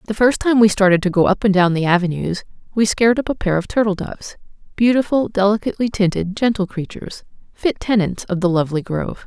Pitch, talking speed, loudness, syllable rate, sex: 200 Hz, 200 wpm, -18 LUFS, 6.3 syllables/s, female